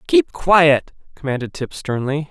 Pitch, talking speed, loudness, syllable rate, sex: 150 Hz, 130 wpm, -18 LUFS, 4.1 syllables/s, male